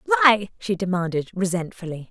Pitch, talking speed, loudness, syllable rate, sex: 200 Hz, 115 wpm, -22 LUFS, 5.0 syllables/s, female